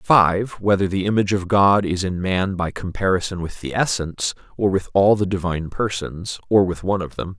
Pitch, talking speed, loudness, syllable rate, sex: 95 Hz, 205 wpm, -20 LUFS, 5.6 syllables/s, male